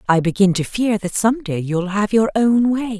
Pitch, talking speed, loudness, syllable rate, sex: 205 Hz, 240 wpm, -18 LUFS, 4.7 syllables/s, female